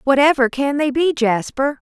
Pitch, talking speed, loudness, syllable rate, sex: 275 Hz, 155 wpm, -17 LUFS, 4.6 syllables/s, female